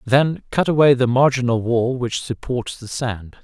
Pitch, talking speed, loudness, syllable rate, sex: 125 Hz, 175 wpm, -19 LUFS, 4.4 syllables/s, male